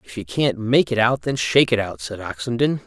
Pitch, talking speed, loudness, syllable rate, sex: 120 Hz, 250 wpm, -20 LUFS, 5.5 syllables/s, male